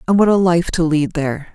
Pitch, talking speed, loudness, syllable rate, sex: 170 Hz, 270 wpm, -16 LUFS, 6.0 syllables/s, female